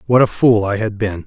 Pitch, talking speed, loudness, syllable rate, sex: 105 Hz, 285 wpm, -16 LUFS, 5.4 syllables/s, male